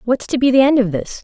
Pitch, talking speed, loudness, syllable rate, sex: 245 Hz, 340 wpm, -15 LUFS, 6.3 syllables/s, female